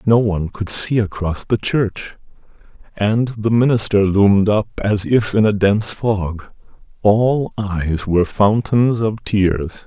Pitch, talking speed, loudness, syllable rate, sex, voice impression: 105 Hz, 145 wpm, -17 LUFS, 3.8 syllables/s, male, masculine, slightly old, slightly weak, slightly dark, slightly hard, clear, slightly intellectual, sincere, mature, slightly strict, modest